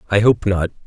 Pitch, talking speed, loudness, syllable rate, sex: 100 Hz, 210 wpm, -17 LUFS, 5.9 syllables/s, male